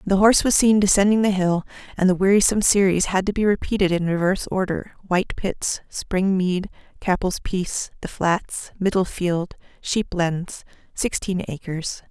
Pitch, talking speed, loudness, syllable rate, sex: 190 Hz, 145 wpm, -21 LUFS, 4.9 syllables/s, female